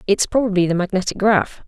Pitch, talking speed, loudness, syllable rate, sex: 195 Hz, 180 wpm, -18 LUFS, 6.1 syllables/s, female